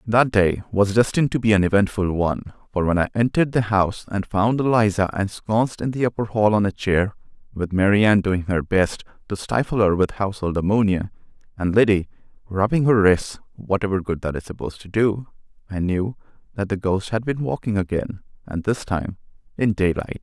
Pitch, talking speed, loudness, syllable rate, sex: 100 Hz, 185 wpm, -21 LUFS, 5.6 syllables/s, male